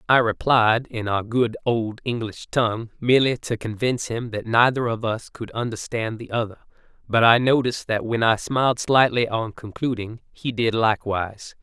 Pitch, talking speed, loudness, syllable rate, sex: 115 Hz, 170 wpm, -22 LUFS, 5.0 syllables/s, male